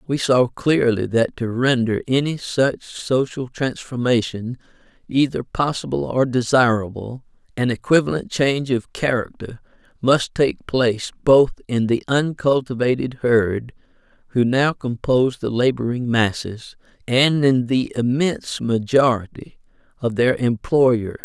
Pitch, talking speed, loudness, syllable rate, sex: 125 Hz, 115 wpm, -20 LUFS, 4.2 syllables/s, male